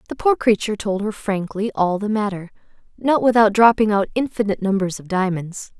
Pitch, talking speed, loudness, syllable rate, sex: 205 Hz, 175 wpm, -19 LUFS, 5.7 syllables/s, female